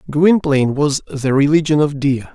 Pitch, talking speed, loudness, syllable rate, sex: 145 Hz, 155 wpm, -15 LUFS, 5.0 syllables/s, male